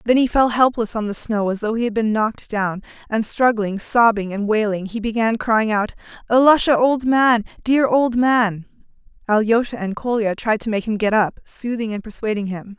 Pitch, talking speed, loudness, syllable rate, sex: 220 Hz, 195 wpm, -19 LUFS, 5.0 syllables/s, female